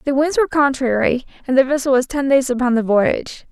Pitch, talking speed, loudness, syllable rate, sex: 265 Hz, 220 wpm, -17 LUFS, 6.1 syllables/s, female